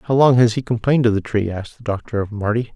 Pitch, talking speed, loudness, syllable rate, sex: 115 Hz, 285 wpm, -19 LUFS, 6.7 syllables/s, male